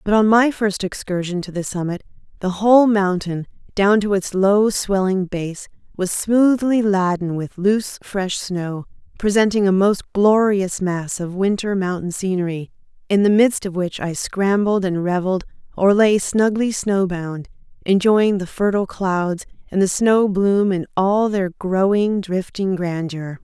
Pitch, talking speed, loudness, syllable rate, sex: 195 Hz, 155 wpm, -19 LUFS, 4.3 syllables/s, female